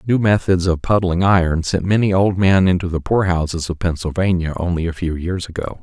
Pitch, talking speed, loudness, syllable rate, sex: 90 Hz, 195 wpm, -18 LUFS, 5.5 syllables/s, male